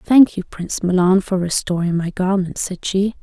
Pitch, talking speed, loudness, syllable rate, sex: 185 Hz, 185 wpm, -18 LUFS, 5.0 syllables/s, female